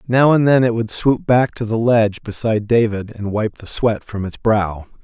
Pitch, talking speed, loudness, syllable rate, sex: 110 Hz, 225 wpm, -17 LUFS, 4.9 syllables/s, male